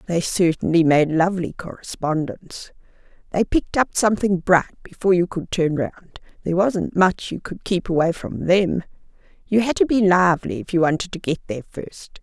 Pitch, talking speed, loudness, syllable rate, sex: 180 Hz, 175 wpm, -20 LUFS, 5.2 syllables/s, female